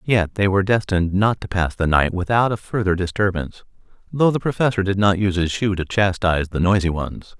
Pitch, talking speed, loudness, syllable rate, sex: 95 Hz, 210 wpm, -20 LUFS, 5.9 syllables/s, male